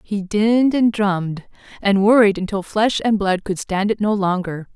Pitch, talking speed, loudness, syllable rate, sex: 200 Hz, 190 wpm, -18 LUFS, 4.7 syllables/s, female